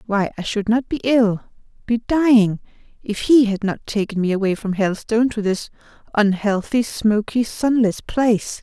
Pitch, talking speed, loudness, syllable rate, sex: 220 Hz, 145 wpm, -19 LUFS, 4.6 syllables/s, female